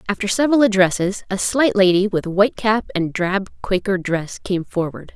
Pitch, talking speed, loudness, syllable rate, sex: 195 Hz, 175 wpm, -19 LUFS, 5.1 syllables/s, female